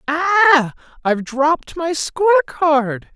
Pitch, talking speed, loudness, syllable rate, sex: 275 Hz, 95 wpm, -16 LUFS, 5.1 syllables/s, female